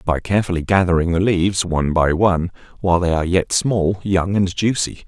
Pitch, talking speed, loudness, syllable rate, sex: 90 Hz, 190 wpm, -18 LUFS, 5.8 syllables/s, male